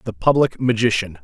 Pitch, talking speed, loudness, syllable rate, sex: 110 Hz, 145 wpm, -18 LUFS, 5.5 syllables/s, male